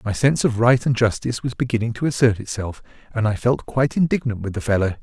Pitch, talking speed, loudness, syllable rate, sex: 115 Hz, 225 wpm, -21 LUFS, 6.6 syllables/s, male